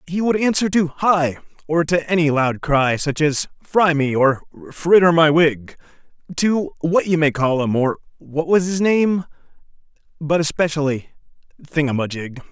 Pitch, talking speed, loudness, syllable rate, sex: 160 Hz, 170 wpm, -18 LUFS, 4.4 syllables/s, male